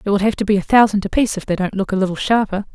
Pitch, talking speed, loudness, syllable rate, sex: 200 Hz, 350 wpm, -17 LUFS, 7.8 syllables/s, female